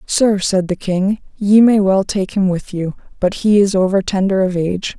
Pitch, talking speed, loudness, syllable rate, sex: 195 Hz, 215 wpm, -15 LUFS, 4.7 syllables/s, female